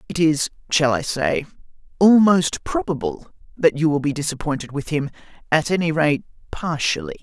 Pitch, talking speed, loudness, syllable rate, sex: 155 Hz, 135 wpm, -20 LUFS, 5.1 syllables/s, male